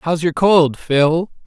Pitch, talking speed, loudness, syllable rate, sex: 165 Hz, 165 wpm, -15 LUFS, 3.3 syllables/s, male